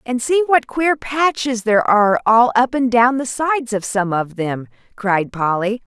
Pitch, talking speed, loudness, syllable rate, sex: 235 Hz, 190 wpm, -17 LUFS, 4.6 syllables/s, female